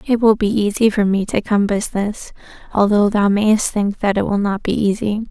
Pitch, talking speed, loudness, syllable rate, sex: 205 Hz, 215 wpm, -17 LUFS, 4.9 syllables/s, female